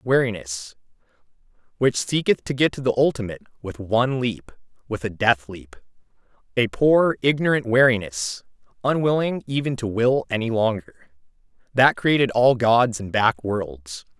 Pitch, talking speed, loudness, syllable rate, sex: 115 Hz, 130 wpm, -21 LUFS, 4.6 syllables/s, male